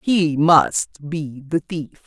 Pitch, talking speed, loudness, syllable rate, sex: 160 Hz, 145 wpm, -19 LUFS, 2.8 syllables/s, female